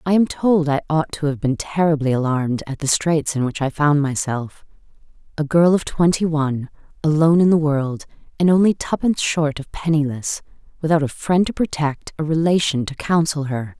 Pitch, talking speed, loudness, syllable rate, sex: 150 Hz, 185 wpm, -19 LUFS, 5.3 syllables/s, female